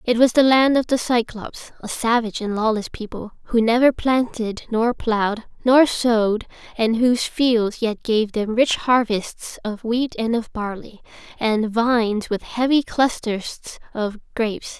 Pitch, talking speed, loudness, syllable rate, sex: 230 Hz, 160 wpm, -20 LUFS, 4.3 syllables/s, female